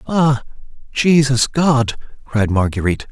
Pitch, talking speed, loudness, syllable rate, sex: 130 Hz, 95 wpm, -16 LUFS, 4.1 syllables/s, male